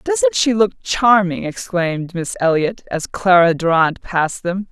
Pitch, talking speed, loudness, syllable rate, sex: 175 Hz, 155 wpm, -17 LUFS, 4.3 syllables/s, female